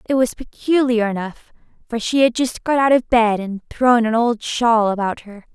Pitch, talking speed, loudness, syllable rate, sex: 235 Hz, 205 wpm, -18 LUFS, 4.6 syllables/s, female